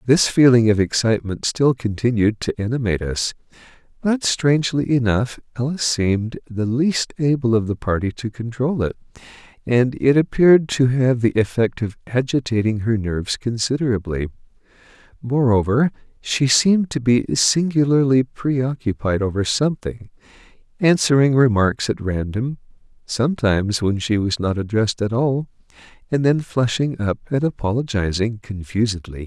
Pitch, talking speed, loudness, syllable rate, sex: 120 Hz, 125 wpm, -19 LUFS, 5.0 syllables/s, male